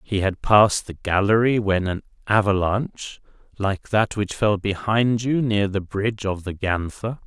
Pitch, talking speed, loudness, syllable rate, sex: 105 Hz, 155 wpm, -21 LUFS, 4.5 syllables/s, male